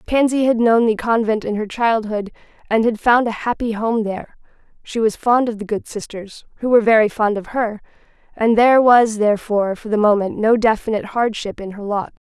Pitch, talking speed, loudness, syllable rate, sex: 220 Hz, 200 wpm, -17 LUFS, 5.5 syllables/s, female